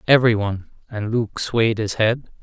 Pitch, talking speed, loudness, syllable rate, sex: 110 Hz, 175 wpm, -20 LUFS, 5.1 syllables/s, male